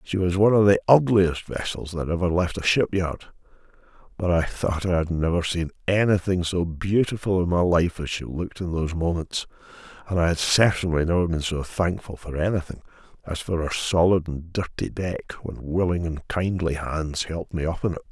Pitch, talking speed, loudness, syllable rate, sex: 85 Hz, 190 wpm, -24 LUFS, 5.3 syllables/s, male